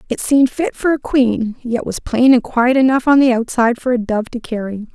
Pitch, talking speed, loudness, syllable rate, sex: 245 Hz, 245 wpm, -15 LUFS, 5.4 syllables/s, female